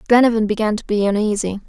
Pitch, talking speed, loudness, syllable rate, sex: 215 Hz, 180 wpm, -18 LUFS, 6.9 syllables/s, female